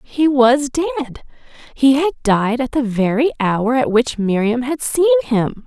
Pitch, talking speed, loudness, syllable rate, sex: 260 Hz, 160 wpm, -16 LUFS, 4.2 syllables/s, female